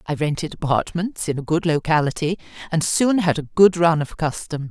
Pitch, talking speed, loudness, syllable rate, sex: 160 Hz, 190 wpm, -20 LUFS, 5.2 syllables/s, female